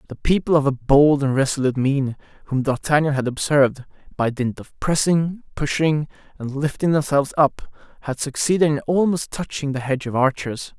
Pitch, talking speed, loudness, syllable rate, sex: 140 Hz, 165 wpm, -20 LUFS, 5.4 syllables/s, male